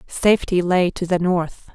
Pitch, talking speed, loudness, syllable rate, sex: 180 Hz, 170 wpm, -19 LUFS, 4.6 syllables/s, female